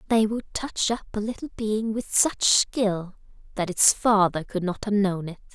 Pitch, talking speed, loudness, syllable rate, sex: 205 Hz, 195 wpm, -24 LUFS, 4.4 syllables/s, female